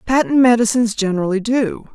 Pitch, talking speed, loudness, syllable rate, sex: 225 Hz, 125 wpm, -16 LUFS, 6.1 syllables/s, female